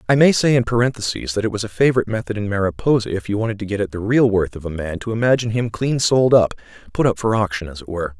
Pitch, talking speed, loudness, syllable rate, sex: 110 Hz, 280 wpm, -19 LUFS, 7.1 syllables/s, male